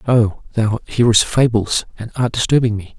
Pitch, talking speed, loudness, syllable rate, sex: 115 Hz, 160 wpm, -16 LUFS, 5.2 syllables/s, male